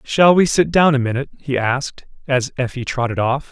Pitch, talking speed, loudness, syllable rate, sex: 135 Hz, 205 wpm, -17 LUFS, 5.5 syllables/s, male